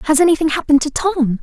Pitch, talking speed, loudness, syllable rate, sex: 305 Hz, 210 wpm, -15 LUFS, 6.5 syllables/s, female